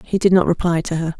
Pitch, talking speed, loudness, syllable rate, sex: 170 Hz, 300 wpm, -17 LUFS, 6.5 syllables/s, female